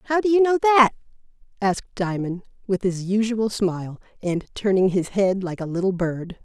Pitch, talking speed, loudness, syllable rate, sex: 205 Hz, 175 wpm, -22 LUFS, 5.2 syllables/s, female